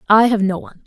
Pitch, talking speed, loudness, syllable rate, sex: 210 Hz, 275 wpm, -16 LUFS, 7.4 syllables/s, female